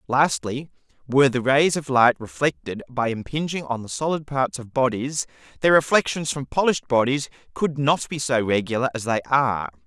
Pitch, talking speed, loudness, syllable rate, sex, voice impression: 130 Hz, 170 wpm, -22 LUFS, 5.1 syllables/s, male, masculine, adult-like, slightly tensed, refreshing, slightly unique, slightly lively